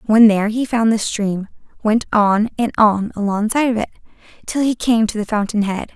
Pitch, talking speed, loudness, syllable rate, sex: 220 Hz, 200 wpm, -17 LUFS, 5.3 syllables/s, female